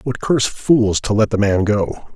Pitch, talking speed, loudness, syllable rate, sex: 110 Hz, 225 wpm, -17 LUFS, 4.8 syllables/s, male